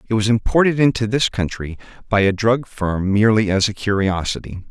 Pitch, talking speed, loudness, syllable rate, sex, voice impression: 105 Hz, 180 wpm, -18 LUFS, 5.5 syllables/s, male, masculine, adult-like, tensed, clear, fluent, intellectual, calm, wild, strict